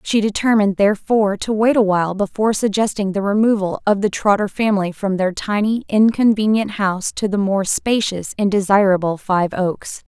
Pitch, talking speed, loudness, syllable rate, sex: 205 Hz, 160 wpm, -17 LUFS, 5.4 syllables/s, female